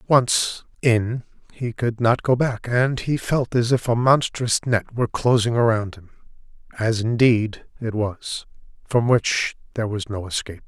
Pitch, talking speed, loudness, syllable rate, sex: 115 Hz, 165 wpm, -21 LUFS, 4.0 syllables/s, male